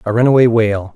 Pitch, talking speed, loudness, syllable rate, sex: 115 Hz, 190 wpm, -13 LUFS, 7.1 syllables/s, male